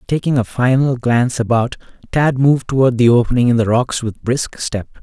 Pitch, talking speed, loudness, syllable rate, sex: 125 Hz, 190 wpm, -16 LUFS, 5.4 syllables/s, male